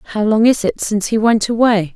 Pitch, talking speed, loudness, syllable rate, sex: 215 Hz, 245 wpm, -15 LUFS, 6.1 syllables/s, female